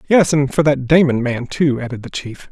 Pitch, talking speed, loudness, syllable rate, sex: 140 Hz, 240 wpm, -16 LUFS, 5.2 syllables/s, male